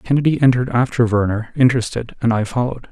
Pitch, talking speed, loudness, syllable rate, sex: 120 Hz, 165 wpm, -17 LUFS, 6.8 syllables/s, male